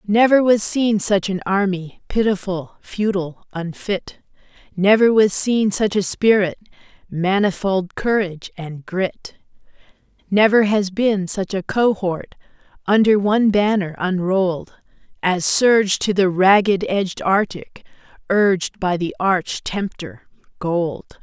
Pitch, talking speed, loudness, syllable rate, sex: 195 Hz, 115 wpm, -18 LUFS, 4.0 syllables/s, female